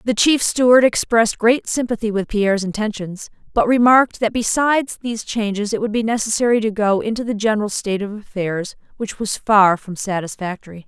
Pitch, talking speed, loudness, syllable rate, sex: 215 Hz, 175 wpm, -18 LUFS, 5.7 syllables/s, female